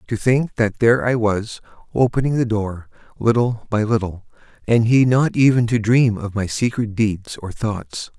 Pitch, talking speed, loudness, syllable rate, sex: 110 Hz, 175 wpm, -19 LUFS, 4.5 syllables/s, male